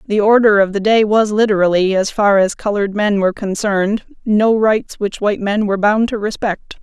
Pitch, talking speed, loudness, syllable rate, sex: 205 Hz, 200 wpm, -15 LUFS, 5.3 syllables/s, female